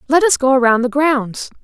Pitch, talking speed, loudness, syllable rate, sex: 265 Hz, 220 wpm, -14 LUFS, 5.2 syllables/s, female